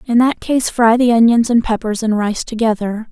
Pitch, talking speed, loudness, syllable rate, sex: 230 Hz, 210 wpm, -15 LUFS, 5.0 syllables/s, female